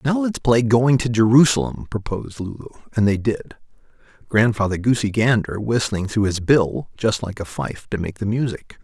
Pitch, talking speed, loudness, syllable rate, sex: 110 Hz, 175 wpm, -20 LUFS, 5.0 syllables/s, male